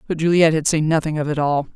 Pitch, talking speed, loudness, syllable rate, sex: 155 Hz, 275 wpm, -18 LUFS, 7.1 syllables/s, female